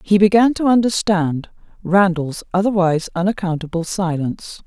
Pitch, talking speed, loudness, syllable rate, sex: 185 Hz, 105 wpm, -18 LUFS, 5.2 syllables/s, female